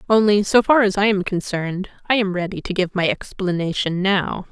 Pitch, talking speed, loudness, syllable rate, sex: 195 Hz, 200 wpm, -19 LUFS, 5.3 syllables/s, female